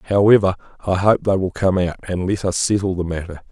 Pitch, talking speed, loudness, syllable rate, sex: 95 Hz, 220 wpm, -19 LUFS, 5.8 syllables/s, male